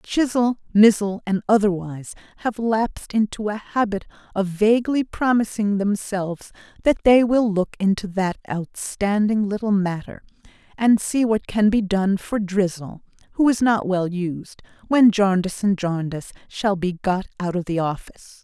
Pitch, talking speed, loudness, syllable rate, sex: 205 Hz, 145 wpm, -21 LUFS, 4.6 syllables/s, female